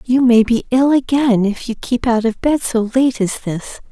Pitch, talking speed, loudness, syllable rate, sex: 240 Hz, 230 wpm, -16 LUFS, 4.5 syllables/s, female